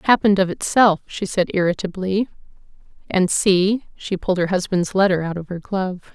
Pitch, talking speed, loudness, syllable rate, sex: 190 Hz, 175 wpm, -20 LUFS, 5.5 syllables/s, female